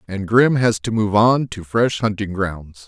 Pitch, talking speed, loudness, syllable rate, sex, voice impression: 105 Hz, 210 wpm, -18 LUFS, 4.1 syllables/s, male, very masculine, adult-like, thick, sincere, calm, slightly mature, slightly wild